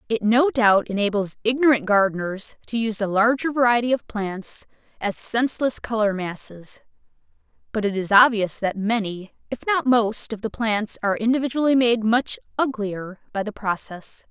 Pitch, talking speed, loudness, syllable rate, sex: 220 Hz, 155 wpm, -22 LUFS, 4.9 syllables/s, female